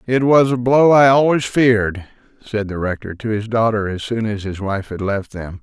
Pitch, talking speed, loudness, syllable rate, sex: 110 Hz, 225 wpm, -17 LUFS, 4.9 syllables/s, male